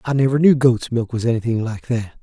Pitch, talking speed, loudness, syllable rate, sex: 120 Hz, 245 wpm, -18 LUFS, 5.8 syllables/s, male